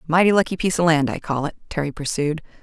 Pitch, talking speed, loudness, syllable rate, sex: 160 Hz, 230 wpm, -21 LUFS, 6.9 syllables/s, female